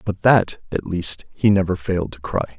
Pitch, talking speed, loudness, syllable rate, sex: 95 Hz, 210 wpm, -20 LUFS, 5.0 syllables/s, male